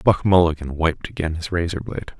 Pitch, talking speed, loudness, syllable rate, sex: 85 Hz, 165 wpm, -21 LUFS, 6.2 syllables/s, male